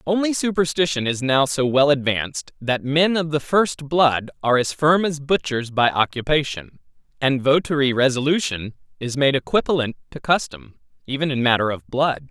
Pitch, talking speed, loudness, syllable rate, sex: 140 Hz, 160 wpm, -20 LUFS, 5.0 syllables/s, male